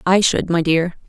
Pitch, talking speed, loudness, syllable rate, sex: 175 Hz, 220 wpm, -17 LUFS, 4.6 syllables/s, female